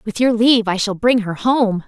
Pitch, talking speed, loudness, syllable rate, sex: 220 Hz, 255 wpm, -16 LUFS, 5.1 syllables/s, female